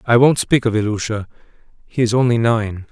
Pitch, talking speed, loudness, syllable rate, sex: 115 Hz, 185 wpm, -17 LUFS, 5.4 syllables/s, male